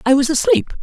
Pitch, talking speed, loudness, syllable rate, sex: 270 Hz, 215 wpm, -15 LUFS, 7.0 syllables/s, female